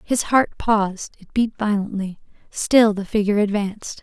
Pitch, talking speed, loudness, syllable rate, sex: 210 Hz, 120 wpm, -20 LUFS, 4.9 syllables/s, female